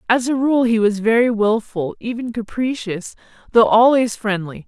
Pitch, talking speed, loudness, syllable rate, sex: 225 Hz, 155 wpm, -18 LUFS, 4.7 syllables/s, female